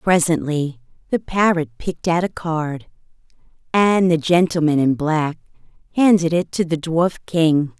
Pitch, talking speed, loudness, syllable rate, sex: 165 Hz, 140 wpm, -19 LUFS, 4.4 syllables/s, female